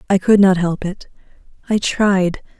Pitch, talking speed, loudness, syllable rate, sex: 190 Hz, 160 wpm, -16 LUFS, 4.2 syllables/s, female